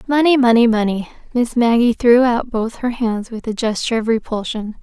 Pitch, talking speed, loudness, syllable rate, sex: 230 Hz, 185 wpm, -17 LUFS, 5.2 syllables/s, female